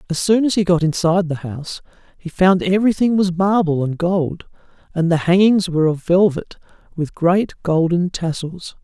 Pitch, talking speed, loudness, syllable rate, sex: 175 Hz, 170 wpm, -17 LUFS, 5.0 syllables/s, male